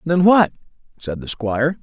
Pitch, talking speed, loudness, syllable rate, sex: 155 Hz, 165 wpm, -18 LUFS, 4.9 syllables/s, male